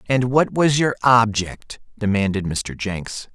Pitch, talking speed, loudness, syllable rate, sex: 110 Hz, 145 wpm, -19 LUFS, 3.8 syllables/s, male